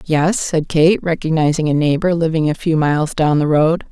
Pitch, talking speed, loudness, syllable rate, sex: 160 Hz, 200 wpm, -16 LUFS, 5.0 syllables/s, female